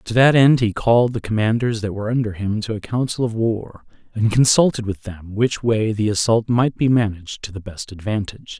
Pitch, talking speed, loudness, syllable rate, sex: 110 Hz, 215 wpm, -19 LUFS, 5.5 syllables/s, male